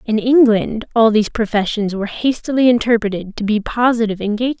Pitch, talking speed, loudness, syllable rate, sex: 225 Hz, 155 wpm, -16 LUFS, 6.3 syllables/s, female